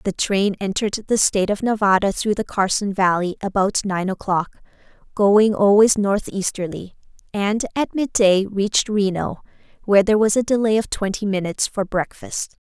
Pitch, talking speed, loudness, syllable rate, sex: 200 Hz, 150 wpm, -19 LUFS, 5.0 syllables/s, female